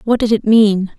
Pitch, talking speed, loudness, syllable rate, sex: 215 Hz, 245 wpm, -13 LUFS, 4.6 syllables/s, female